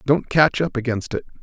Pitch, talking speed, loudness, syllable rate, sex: 135 Hz, 210 wpm, -20 LUFS, 5.2 syllables/s, male